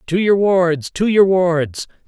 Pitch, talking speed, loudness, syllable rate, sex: 175 Hz, 175 wpm, -16 LUFS, 3.4 syllables/s, male